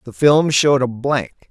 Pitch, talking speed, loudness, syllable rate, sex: 135 Hz, 200 wpm, -16 LUFS, 4.8 syllables/s, male